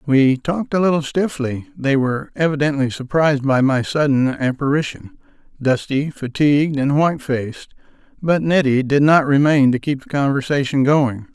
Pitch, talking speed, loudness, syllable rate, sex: 140 Hz, 145 wpm, -18 LUFS, 5.0 syllables/s, male